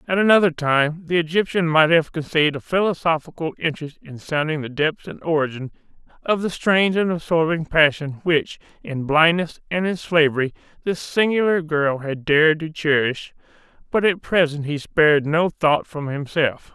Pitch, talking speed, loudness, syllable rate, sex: 160 Hz, 160 wpm, -20 LUFS, 5.0 syllables/s, male